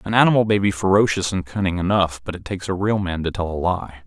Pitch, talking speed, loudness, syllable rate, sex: 95 Hz, 265 wpm, -20 LUFS, 6.5 syllables/s, male